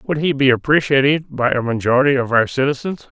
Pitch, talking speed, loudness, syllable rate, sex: 135 Hz, 190 wpm, -16 LUFS, 5.9 syllables/s, male